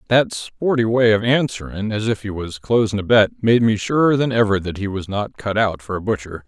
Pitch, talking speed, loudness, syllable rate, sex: 110 Hz, 240 wpm, -19 LUFS, 5.4 syllables/s, male